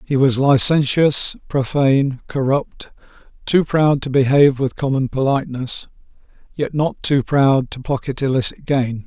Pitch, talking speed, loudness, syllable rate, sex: 135 Hz, 130 wpm, -17 LUFS, 4.5 syllables/s, male